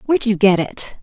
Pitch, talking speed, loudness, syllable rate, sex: 210 Hz, 235 wpm, -16 LUFS, 5.3 syllables/s, female